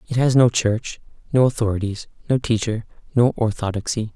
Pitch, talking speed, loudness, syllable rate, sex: 115 Hz, 145 wpm, -20 LUFS, 5.4 syllables/s, male